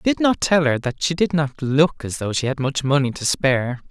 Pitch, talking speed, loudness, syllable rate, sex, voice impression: 145 Hz, 290 wpm, -20 LUFS, 5.8 syllables/s, male, masculine, gender-neutral, slightly middle-aged, slightly thick, very tensed, powerful, bright, soft, very clear, fluent, slightly cool, intellectual, very refreshing, sincere, calm, friendly, slightly reassuring, very unique, slightly elegant, wild, slightly sweet, very lively, kind, intense